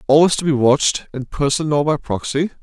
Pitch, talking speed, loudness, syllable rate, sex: 145 Hz, 205 wpm, -17 LUFS, 5.6 syllables/s, male